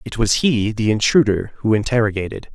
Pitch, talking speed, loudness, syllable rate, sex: 110 Hz, 165 wpm, -18 LUFS, 5.5 syllables/s, male